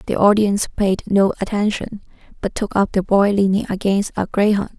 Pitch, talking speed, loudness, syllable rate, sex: 200 Hz, 175 wpm, -18 LUFS, 5.2 syllables/s, female